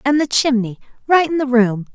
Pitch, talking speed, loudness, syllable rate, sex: 255 Hz, 215 wpm, -16 LUFS, 5.4 syllables/s, female